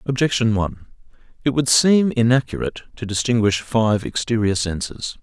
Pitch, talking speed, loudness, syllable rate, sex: 115 Hz, 125 wpm, -19 LUFS, 5.4 syllables/s, male